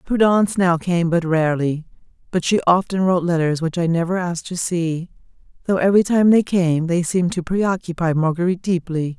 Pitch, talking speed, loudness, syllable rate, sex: 175 Hz, 175 wpm, -19 LUFS, 5.6 syllables/s, female